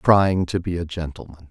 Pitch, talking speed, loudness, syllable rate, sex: 85 Hz, 200 wpm, -22 LUFS, 5.2 syllables/s, male